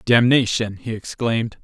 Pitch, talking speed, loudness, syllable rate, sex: 115 Hz, 110 wpm, -20 LUFS, 4.6 syllables/s, male